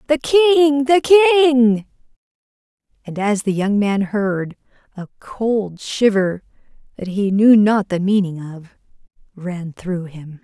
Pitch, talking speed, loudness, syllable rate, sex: 220 Hz, 130 wpm, -16 LUFS, 3.4 syllables/s, female